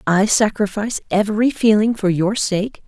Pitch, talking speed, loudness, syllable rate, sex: 205 Hz, 145 wpm, -17 LUFS, 5.0 syllables/s, female